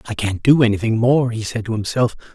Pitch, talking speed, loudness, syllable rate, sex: 115 Hz, 230 wpm, -18 LUFS, 6.1 syllables/s, male